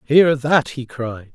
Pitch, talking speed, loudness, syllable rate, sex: 135 Hz, 180 wpm, -18 LUFS, 3.3 syllables/s, male